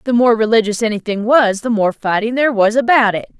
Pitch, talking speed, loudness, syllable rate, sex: 225 Hz, 210 wpm, -14 LUFS, 6.0 syllables/s, female